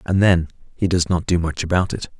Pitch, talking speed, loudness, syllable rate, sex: 85 Hz, 245 wpm, -20 LUFS, 5.6 syllables/s, male